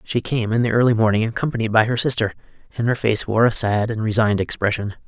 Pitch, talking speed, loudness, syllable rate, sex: 110 Hz, 225 wpm, -19 LUFS, 6.5 syllables/s, male